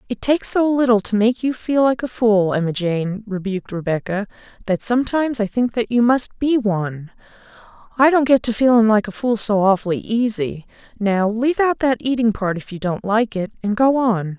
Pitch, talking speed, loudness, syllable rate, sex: 220 Hz, 205 wpm, -18 LUFS, 5.3 syllables/s, female